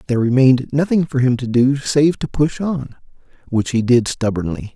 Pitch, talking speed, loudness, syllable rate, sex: 130 Hz, 190 wpm, -17 LUFS, 5.3 syllables/s, male